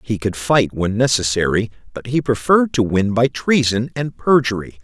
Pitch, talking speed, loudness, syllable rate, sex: 115 Hz, 175 wpm, -17 LUFS, 4.9 syllables/s, male